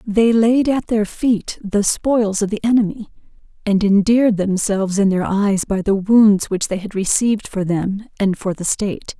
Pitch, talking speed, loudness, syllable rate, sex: 205 Hz, 190 wpm, -17 LUFS, 4.6 syllables/s, female